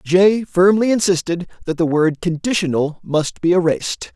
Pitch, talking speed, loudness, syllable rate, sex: 175 Hz, 145 wpm, -17 LUFS, 4.6 syllables/s, male